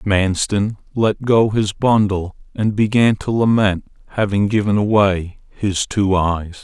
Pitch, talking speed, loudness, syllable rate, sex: 100 Hz, 135 wpm, -17 LUFS, 3.8 syllables/s, male